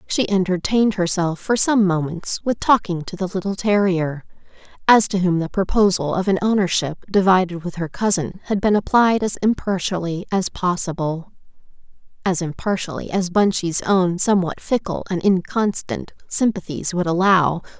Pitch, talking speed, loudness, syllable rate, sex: 185 Hz, 140 wpm, -20 LUFS, 4.9 syllables/s, female